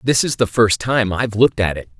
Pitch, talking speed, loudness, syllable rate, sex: 110 Hz, 270 wpm, -17 LUFS, 6.0 syllables/s, male